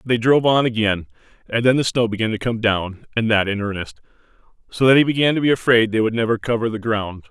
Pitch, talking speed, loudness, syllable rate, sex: 115 Hz, 240 wpm, -19 LUFS, 6.3 syllables/s, male